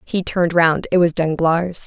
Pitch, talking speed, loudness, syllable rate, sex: 170 Hz, 195 wpm, -17 LUFS, 4.6 syllables/s, female